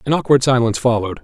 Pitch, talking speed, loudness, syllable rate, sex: 125 Hz, 195 wpm, -16 LUFS, 8.1 syllables/s, male